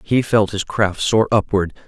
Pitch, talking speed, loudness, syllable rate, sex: 100 Hz, 190 wpm, -18 LUFS, 4.3 syllables/s, male